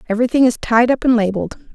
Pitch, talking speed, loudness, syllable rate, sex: 235 Hz, 205 wpm, -15 LUFS, 7.9 syllables/s, female